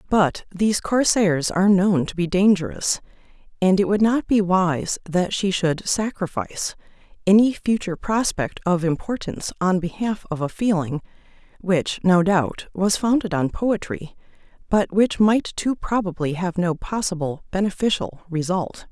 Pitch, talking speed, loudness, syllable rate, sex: 185 Hz, 145 wpm, -21 LUFS, 4.5 syllables/s, female